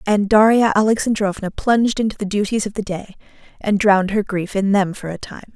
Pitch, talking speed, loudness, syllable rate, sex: 205 Hz, 205 wpm, -18 LUFS, 5.7 syllables/s, female